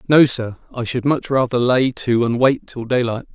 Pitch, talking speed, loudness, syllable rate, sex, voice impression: 125 Hz, 215 wpm, -18 LUFS, 4.8 syllables/s, male, masculine, adult-like, clear, slightly halting, intellectual, calm, slightly friendly, slightly wild, kind